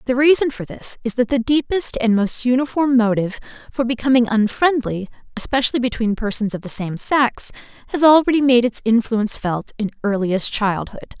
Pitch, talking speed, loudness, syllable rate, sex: 240 Hz, 165 wpm, -18 LUFS, 5.3 syllables/s, female